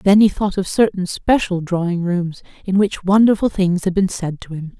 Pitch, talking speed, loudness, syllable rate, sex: 185 Hz, 215 wpm, -18 LUFS, 4.9 syllables/s, female